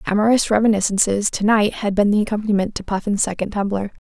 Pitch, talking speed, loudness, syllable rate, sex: 210 Hz, 175 wpm, -19 LUFS, 6.5 syllables/s, female